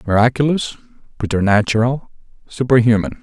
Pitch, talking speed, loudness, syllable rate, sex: 120 Hz, 55 wpm, -17 LUFS, 5.6 syllables/s, male